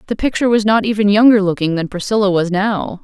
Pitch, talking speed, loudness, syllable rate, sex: 205 Hz, 215 wpm, -15 LUFS, 6.4 syllables/s, female